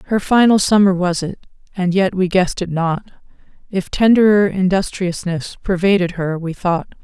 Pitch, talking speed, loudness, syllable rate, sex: 185 Hz, 155 wpm, -16 LUFS, 4.8 syllables/s, female